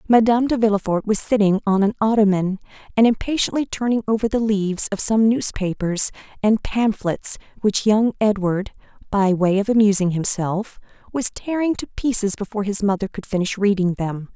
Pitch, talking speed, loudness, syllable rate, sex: 210 Hz, 160 wpm, -20 LUFS, 5.3 syllables/s, female